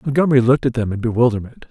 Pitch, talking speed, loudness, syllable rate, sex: 125 Hz, 210 wpm, -17 LUFS, 8.2 syllables/s, male